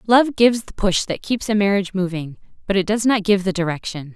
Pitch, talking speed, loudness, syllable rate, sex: 200 Hz, 230 wpm, -19 LUFS, 5.9 syllables/s, female